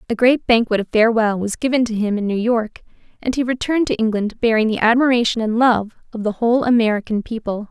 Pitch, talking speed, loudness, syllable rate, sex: 225 Hz, 210 wpm, -18 LUFS, 6.2 syllables/s, female